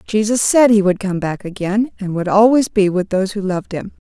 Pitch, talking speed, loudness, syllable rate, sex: 200 Hz, 235 wpm, -16 LUFS, 5.6 syllables/s, female